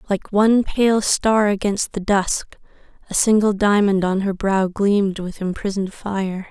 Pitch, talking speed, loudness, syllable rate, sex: 200 Hz, 155 wpm, -19 LUFS, 4.4 syllables/s, female